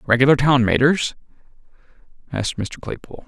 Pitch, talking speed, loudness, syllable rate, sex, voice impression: 135 Hz, 110 wpm, -19 LUFS, 5.9 syllables/s, male, masculine, adult-like, slightly relaxed, slightly weak, muffled, raspy, calm, mature, slightly reassuring, wild, modest